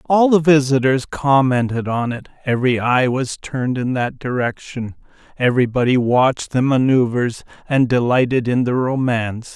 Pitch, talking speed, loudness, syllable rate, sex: 130 Hz, 140 wpm, -17 LUFS, 4.9 syllables/s, male